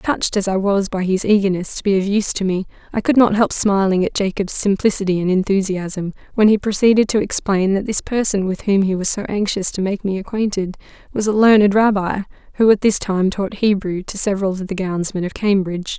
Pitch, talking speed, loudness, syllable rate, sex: 195 Hz, 220 wpm, -18 LUFS, 5.7 syllables/s, female